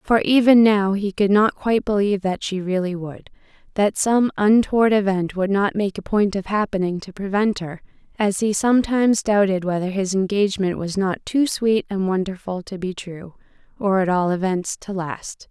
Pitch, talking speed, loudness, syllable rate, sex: 200 Hz, 180 wpm, -20 LUFS, 5.0 syllables/s, female